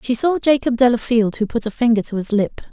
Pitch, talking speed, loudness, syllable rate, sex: 235 Hz, 245 wpm, -18 LUFS, 5.9 syllables/s, female